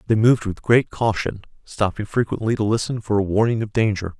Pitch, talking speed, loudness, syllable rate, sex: 105 Hz, 200 wpm, -21 LUFS, 5.9 syllables/s, male